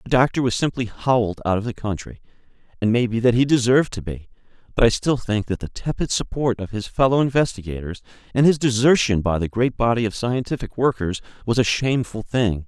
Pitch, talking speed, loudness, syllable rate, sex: 115 Hz, 205 wpm, -21 LUFS, 5.9 syllables/s, male